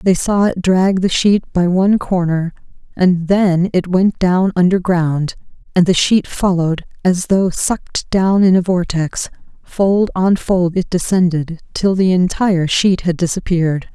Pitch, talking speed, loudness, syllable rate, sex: 180 Hz, 160 wpm, -15 LUFS, 4.2 syllables/s, female